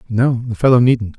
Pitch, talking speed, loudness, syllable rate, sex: 120 Hz, 205 wpm, -15 LUFS, 5.0 syllables/s, male